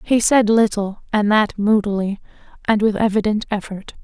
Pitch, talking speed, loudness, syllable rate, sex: 210 Hz, 150 wpm, -18 LUFS, 4.9 syllables/s, female